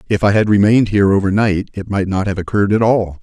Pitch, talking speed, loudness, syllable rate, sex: 100 Hz, 260 wpm, -15 LUFS, 6.7 syllables/s, male